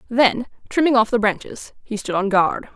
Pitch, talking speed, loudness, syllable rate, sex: 220 Hz, 195 wpm, -19 LUFS, 5.0 syllables/s, female